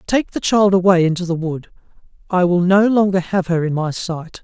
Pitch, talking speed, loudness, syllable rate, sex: 180 Hz, 215 wpm, -17 LUFS, 5.2 syllables/s, male